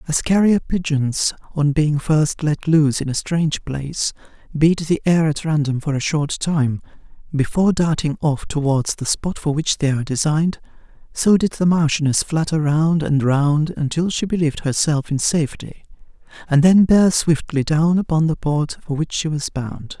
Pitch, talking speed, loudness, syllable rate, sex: 155 Hz, 175 wpm, -19 LUFS, 4.8 syllables/s, male